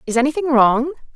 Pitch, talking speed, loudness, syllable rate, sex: 270 Hz, 155 wpm, -16 LUFS, 6.3 syllables/s, female